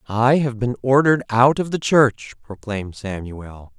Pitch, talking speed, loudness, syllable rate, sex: 120 Hz, 160 wpm, -19 LUFS, 4.5 syllables/s, male